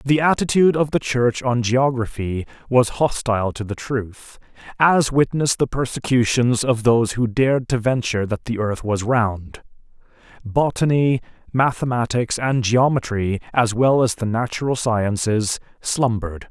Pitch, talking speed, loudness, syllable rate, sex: 120 Hz, 140 wpm, -20 LUFS, 4.6 syllables/s, male